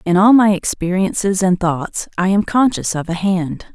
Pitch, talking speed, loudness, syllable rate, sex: 190 Hz, 190 wpm, -16 LUFS, 4.5 syllables/s, female